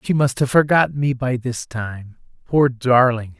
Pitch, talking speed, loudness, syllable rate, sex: 125 Hz, 175 wpm, -18 LUFS, 4.3 syllables/s, male